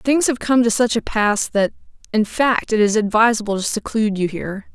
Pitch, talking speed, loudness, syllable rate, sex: 220 Hz, 215 wpm, -18 LUFS, 5.4 syllables/s, female